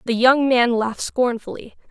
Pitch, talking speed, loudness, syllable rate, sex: 240 Hz, 155 wpm, -18 LUFS, 5.0 syllables/s, female